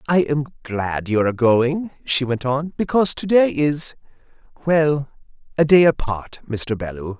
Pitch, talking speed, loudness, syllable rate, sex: 135 Hz, 150 wpm, -19 LUFS, 4.2 syllables/s, male